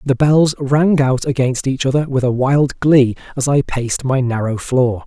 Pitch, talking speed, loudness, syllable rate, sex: 135 Hz, 200 wpm, -16 LUFS, 4.5 syllables/s, male